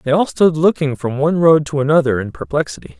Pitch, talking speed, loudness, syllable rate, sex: 140 Hz, 220 wpm, -16 LUFS, 6.1 syllables/s, male